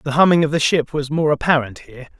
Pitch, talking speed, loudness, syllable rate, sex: 145 Hz, 245 wpm, -17 LUFS, 6.3 syllables/s, male